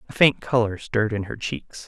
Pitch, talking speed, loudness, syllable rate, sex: 110 Hz, 225 wpm, -23 LUFS, 5.3 syllables/s, male